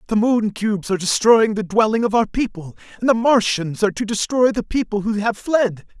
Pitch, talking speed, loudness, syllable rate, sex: 215 Hz, 210 wpm, -18 LUFS, 5.5 syllables/s, male